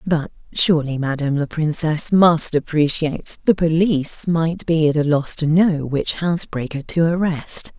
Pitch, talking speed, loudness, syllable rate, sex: 160 Hz, 155 wpm, -19 LUFS, 4.8 syllables/s, female